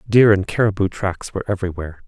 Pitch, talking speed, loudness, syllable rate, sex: 100 Hz, 175 wpm, -19 LUFS, 6.8 syllables/s, male